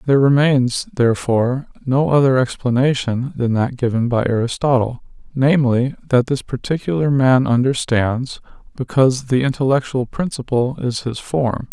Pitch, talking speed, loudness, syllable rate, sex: 130 Hz, 120 wpm, -17 LUFS, 4.9 syllables/s, male